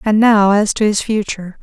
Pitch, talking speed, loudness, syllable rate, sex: 210 Hz, 220 wpm, -14 LUFS, 5.3 syllables/s, female